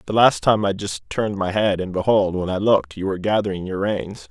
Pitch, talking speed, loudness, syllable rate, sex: 100 Hz, 250 wpm, -20 LUFS, 5.8 syllables/s, male